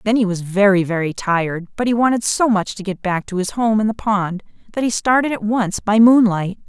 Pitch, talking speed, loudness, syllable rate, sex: 205 Hz, 245 wpm, -17 LUFS, 5.4 syllables/s, female